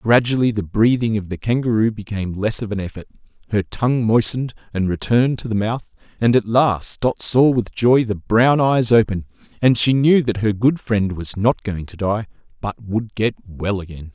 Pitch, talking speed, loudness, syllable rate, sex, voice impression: 110 Hz, 200 wpm, -19 LUFS, 5.0 syllables/s, male, very masculine, very middle-aged, very thick, tensed, powerful, slightly bright, slightly soft, slightly muffled, fluent, very cool, very intellectual, slightly refreshing, very sincere, very calm, very mature, very friendly, very reassuring, very unique, elegant, wild, slightly sweet, lively, kind, slightly intense